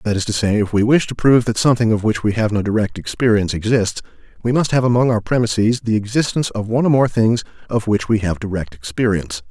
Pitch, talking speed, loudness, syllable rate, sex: 110 Hz, 240 wpm, -17 LUFS, 6.6 syllables/s, male